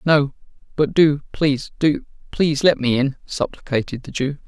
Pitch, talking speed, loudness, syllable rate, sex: 140 Hz, 150 wpm, -20 LUFS, 5.0 syllables/s, male